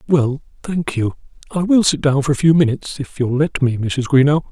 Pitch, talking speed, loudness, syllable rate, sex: 145 Hz, 200 wpm, -17 LUFS, 5.4 syllables/s, male